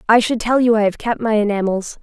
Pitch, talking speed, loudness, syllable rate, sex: 220 Hz, 265 wpm, -17 LUFS, 5.9 syllables/s, female